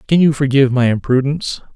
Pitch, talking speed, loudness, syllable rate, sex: 135 Hz, 170 wpm, -15 LUFS, 6.7 syllables/s, male